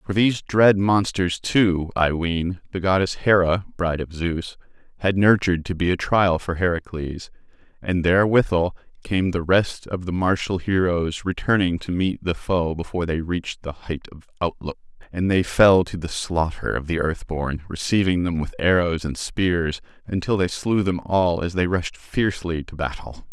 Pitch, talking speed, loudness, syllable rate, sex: 90 Hz, 175 wpm, -22 LUFS, 4.7 syllables/s, male